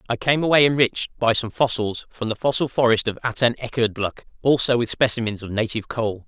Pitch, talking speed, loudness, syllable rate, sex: 120 Hz, 180 wpm, -21 LUFS, 6.1 syllables/s, male